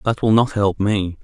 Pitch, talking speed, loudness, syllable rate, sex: 105 Hz, 245 wpm, -18 LUFS, 4.6 syllables/s, male